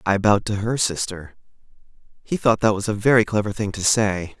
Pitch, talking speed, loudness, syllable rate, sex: 105 Hz, 205 wpm, -20 LUFS, 5.6 syllables/s, male